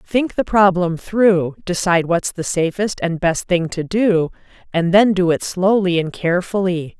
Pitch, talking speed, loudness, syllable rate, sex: 180 Hz, 170 wpm, -17 LUFS, 4.4 syllables/s, female